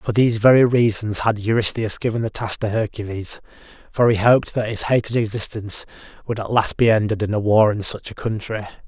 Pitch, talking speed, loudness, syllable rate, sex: 110 Hz, 205 wpm, -19 LUFS, 5.8 syllables/s, male